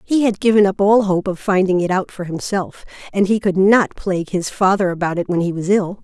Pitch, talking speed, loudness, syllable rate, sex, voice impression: 190 Hz, 250 wpm, -17 LUFS, 5.5 syllables/s, female, feminine, adult-like, tensed, bright, clear, fluent, intellectual, friendly, elegant, lively, kind, light